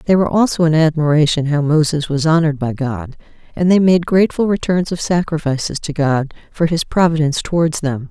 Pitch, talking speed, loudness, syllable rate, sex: 155 Hz, 185 wpm, -16 LUFS, 5.8 syllables/s, female